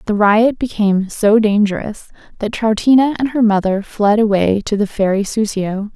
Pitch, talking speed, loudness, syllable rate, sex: 210 Hz, 160 wpm, -15 LUFS, 4.8 syllables/s, female